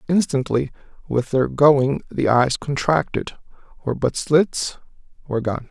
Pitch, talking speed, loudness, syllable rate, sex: 140 Hz, 125 wpm, -20 LUFS, 4.4 syllables/s, male